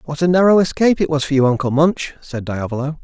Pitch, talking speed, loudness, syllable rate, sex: 150 Hz, 235 wpm, -16 LUFS, 6.4 syllables/s, male